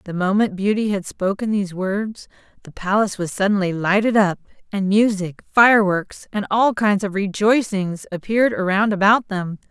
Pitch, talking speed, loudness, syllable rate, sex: 200 Hz, 155 wpm, -19 LUFS, 4.9 syllables/s, female